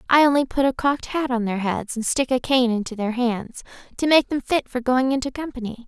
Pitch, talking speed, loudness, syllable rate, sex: 250 Hz, 235 wpm, -22 LUFS, 5.6 syllables/s, female